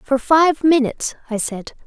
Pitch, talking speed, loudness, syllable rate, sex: 270 Hz, 160 wpm, -17 LUFS, 4.5 syllables/s, female